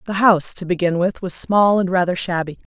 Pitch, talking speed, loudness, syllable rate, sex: 185 Hz, 220 wpm, -18 LUFS, 5.7 syllables/s, female